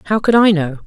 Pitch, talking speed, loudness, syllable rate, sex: 190 Hz, 275 wpm, -14 LUFS, 6.5 syllables/s, female